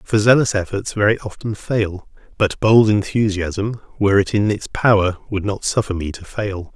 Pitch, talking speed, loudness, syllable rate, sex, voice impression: 100 Hz, 180 wpm, -18 LUFS, 4.8 syllables/s, male, masculine, middle-aged, thick, powerful, slightly soft, slightly muffled, raspy, sincere, mature, friendly, reassuring, wild, slightly strict, slightly modest